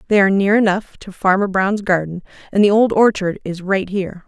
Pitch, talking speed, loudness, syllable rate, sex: 195 Hz, 210 wpm, -16 LUFS, 5.6 syllables/s, female